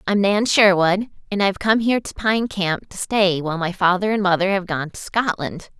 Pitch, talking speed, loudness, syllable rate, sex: 195 Hz, 220 wpm, -19 LUFS, 5.2 syllables/s, female